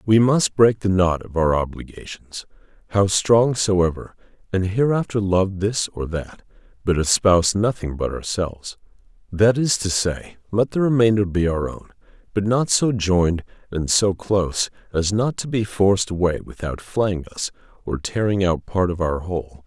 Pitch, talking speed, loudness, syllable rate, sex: 95 Hz, 170 wpm, -20 LUFS, 4.6 syllables/s, male